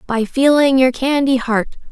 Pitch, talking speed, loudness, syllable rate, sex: 260 Hz, 155 wpm, -15 LUFS, 4.5 syllables/s, female